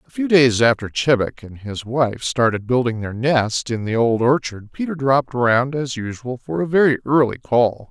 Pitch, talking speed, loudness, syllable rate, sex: 125 Hz, 195 wpm, -19 LUFS, 4.9 syllables/s, male